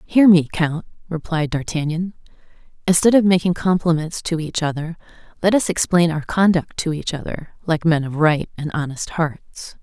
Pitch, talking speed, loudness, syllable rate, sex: 165 Hz, 165 wpm, -19 LUFS, 4.8 syllables/s, female